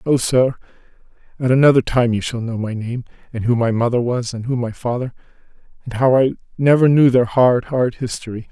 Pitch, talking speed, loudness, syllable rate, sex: 125 Hz, 195 wpm, -17 LUFS, 5.6 syllables/s, male